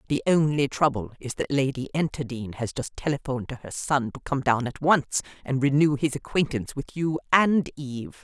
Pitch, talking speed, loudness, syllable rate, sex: 140 Hz, 190 wpm, -25 LUFS, 5.4 syllables/s, female